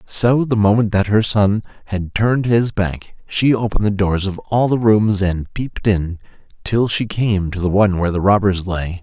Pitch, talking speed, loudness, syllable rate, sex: 100 Hz, 205 wpm, -17 LUFS, 4.8 syllables/s, male